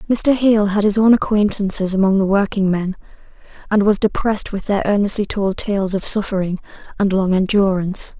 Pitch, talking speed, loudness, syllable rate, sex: 200 Hz, 170 wpm, -17 LUFS, 5.4 syllables/s, female